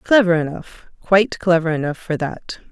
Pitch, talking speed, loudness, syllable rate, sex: 175 Hz, 135 wpm, -18 LUFS, 5.0 syllables/s, female